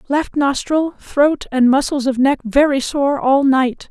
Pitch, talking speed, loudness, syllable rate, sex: 275 Hz, 170 wpm, -16 LUFS, 3.9 syllables/s, female